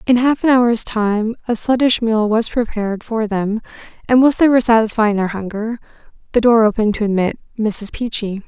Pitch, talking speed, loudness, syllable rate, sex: 225 Hz, 185 wpm, -16 LUFS, 5.3 syllables/s, female